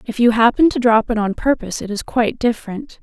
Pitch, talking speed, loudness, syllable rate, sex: 235 Hz, 240 wpm, -17 LUFS, 6.2 syllables/s, female